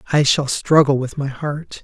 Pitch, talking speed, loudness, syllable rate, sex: 140 Hz, 195 wpm, -18 LUFS, 4.5 syllables/s, male